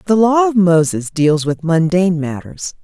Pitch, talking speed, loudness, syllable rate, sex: 175 Hz, 170 wpm, -14 LUFS, 4.6 syllables/s, female